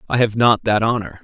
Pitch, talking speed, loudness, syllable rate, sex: 110 Hz, 245 wpm, -17 LUFS, 5.7 syllables/s, male